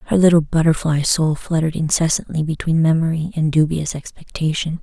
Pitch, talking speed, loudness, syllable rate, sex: 160 Hz, 135 wpm, -18 LUFS, 5.7 syllables/s, female